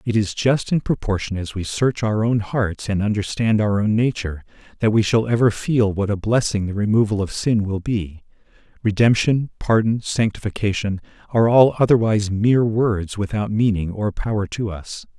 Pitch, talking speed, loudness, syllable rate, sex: 105 Hz, 175 wpm, -20 LUFS, 5.1 syllables/s, male